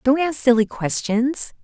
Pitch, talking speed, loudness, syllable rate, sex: 255 Hz, 145 wpm, -19 LUFS, 4.1 syllables/s, female